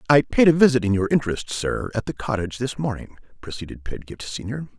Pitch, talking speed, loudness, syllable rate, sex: 120 Hz, 200 wpm, -22 LUFS, 6.2 syllables/s, male